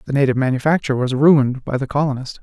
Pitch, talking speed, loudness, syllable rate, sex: 135 Hz, 200 wpm, -17 LUFS, 7.5 syllables/s, male